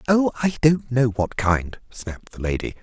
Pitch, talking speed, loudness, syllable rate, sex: 125 Hz, 190 wpm, -21 LUFS, 4.6 syllables/s, male